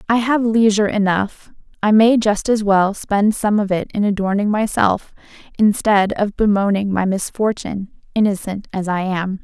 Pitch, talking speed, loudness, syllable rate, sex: 205 Hz, 155 wpm, -17 LUFS, 4.7 syllables/s, female